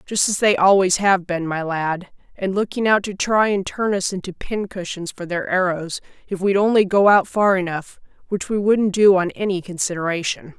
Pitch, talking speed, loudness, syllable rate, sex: 190 Hz, 205 wpm, -19 LUFS, 4.9 syllables/s, female